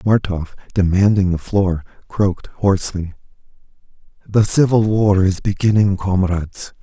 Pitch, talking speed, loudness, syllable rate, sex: 95 Hz, 105 wpm, -17 LUFS, 4.5 syllables/s, male